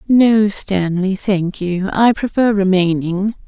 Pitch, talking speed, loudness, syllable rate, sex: 195 Hz, 120 wpm, -16 LUFS, 3.5 syllables/s, female